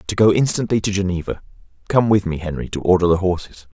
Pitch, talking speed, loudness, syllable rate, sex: 95 Hz, 205 wpm, -19 LUFS, 6.4 syllables/s, male